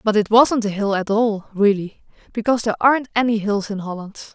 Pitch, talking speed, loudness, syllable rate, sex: 215 Hz, 205 wpm, -19 LUFS, 5.8 syllables/s, female